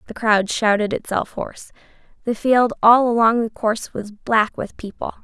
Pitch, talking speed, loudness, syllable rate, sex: 225 Hz, 170 wpm, -19 LUFS, 4.8 syllables/s, female